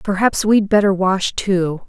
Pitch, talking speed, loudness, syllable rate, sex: 195 Hz, 160 wpm, -16 LUFS, 4.0 syllables/s, female